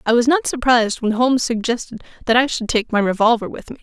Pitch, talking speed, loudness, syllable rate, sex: 235 Hz, 235 wpm, -17 LUFS, 6.5 syllables/s, female